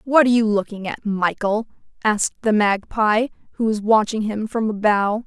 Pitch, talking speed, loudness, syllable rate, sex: 215 Hz, 180 wpm, -20 LUFS, 5.0 syllables/s, female